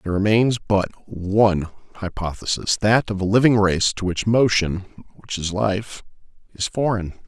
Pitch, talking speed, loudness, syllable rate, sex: 100 Hz, 150 wpm, -20 LUFS, 4.7 syllables/s, male